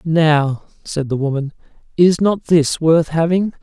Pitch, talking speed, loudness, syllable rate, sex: 160 Hz, 150 wpm, -16 LUFS, 3.9 syllables/s, male